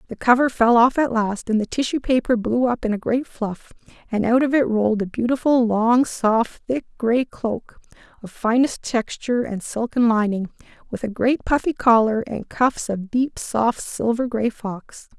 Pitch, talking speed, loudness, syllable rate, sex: 235 Hz, 185 wpm, -21 LUFS, 4.5 syllables/s, female